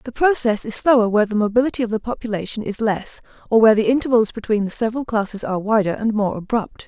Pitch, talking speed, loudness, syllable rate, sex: 220 Hz, 220 wpm, -19 LUFS, 6.8 syllables/s, female